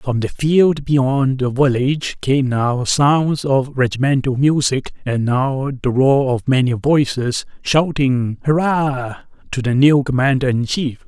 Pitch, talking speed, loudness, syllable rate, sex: 135 Hz, 145 wpm, -17 LUFS, 3.9 syllables/s, male